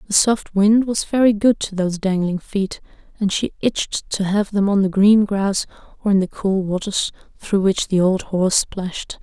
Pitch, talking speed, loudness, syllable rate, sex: 200 Hz, 200 wpm, -19 LUFS, 4.8 syllables/s, female